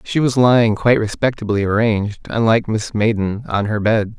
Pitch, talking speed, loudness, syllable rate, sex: 110 Hz, 170 wpm, -17 LUFS, 5.6 syllables/s, male